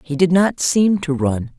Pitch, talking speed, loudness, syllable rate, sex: 165 Hz, 225 wpm, -17 LUFS, 4.1 syllables/s, female